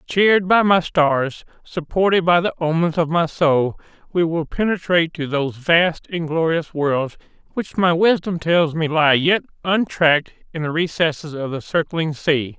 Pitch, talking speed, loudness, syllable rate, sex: 165 Hz, 165 wpm, -19 LUFS, 4.5 syllables/s, male